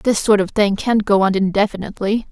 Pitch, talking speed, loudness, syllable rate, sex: 205 Hz, 205 wpm, -17 LUFS, 5.7 syllables/s, female